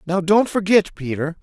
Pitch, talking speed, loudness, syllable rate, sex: 180 Hz, 170 wpm, -18 LUFS, 4.8 syllables/s, male